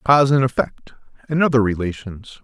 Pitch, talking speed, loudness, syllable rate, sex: 120 Hz, 175 wpm, -18 LUFS, 6.1 syllables/s, male